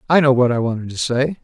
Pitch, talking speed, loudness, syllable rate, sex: 130 Hz, 290 wpm, -17 LUFS, 6.6 syllables/s, male